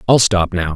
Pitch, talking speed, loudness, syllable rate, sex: 95 Hz, 240 wpm, -15 LUFS, 5.1 syllables/s, male